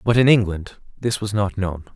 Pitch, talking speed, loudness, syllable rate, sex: 105 Hz, 215 wpm, -20 LUFS, 5.0 syllables/s, male